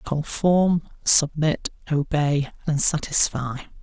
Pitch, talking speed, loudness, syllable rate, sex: 150 Hz, 80 wpm, -21 LUFS, 3.2 syllables/s, male